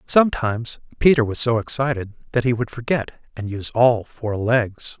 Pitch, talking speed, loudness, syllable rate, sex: 120 Hz, 170 wpm, -20 LUFS, 5.1 syllables/s, male